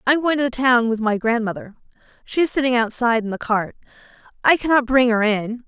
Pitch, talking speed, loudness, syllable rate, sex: 240 Hz, 220 wpm, -19 LUFS, 6.2 syllables/s, female